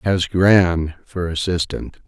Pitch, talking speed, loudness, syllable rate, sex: 90 Hz, 145 wpm, -18 LUFS, 3.8 syllables/s, male